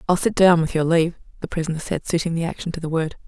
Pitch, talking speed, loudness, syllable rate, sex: 165 Hz, 275 wpm, -21 LUFS, 7.2 syllables/s, female